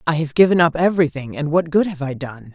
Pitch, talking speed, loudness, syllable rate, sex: 160 Hz, 235 wpm, -18 LUFS, 6.2 syllables/s, female